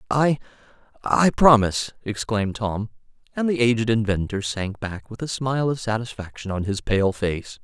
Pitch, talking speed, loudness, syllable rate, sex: 115 Hz, 150 wpm, -23 LUFS, 5.1 syllables/s, male